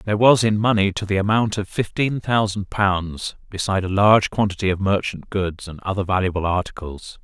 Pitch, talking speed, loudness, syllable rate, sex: 100 Hz, 185 wpm, -20 LUFS, 5.5 syllables/s, male